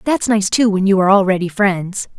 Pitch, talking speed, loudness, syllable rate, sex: 200 Hz, 220 wpm, -15 LUFS, 5.5 syllables/s, female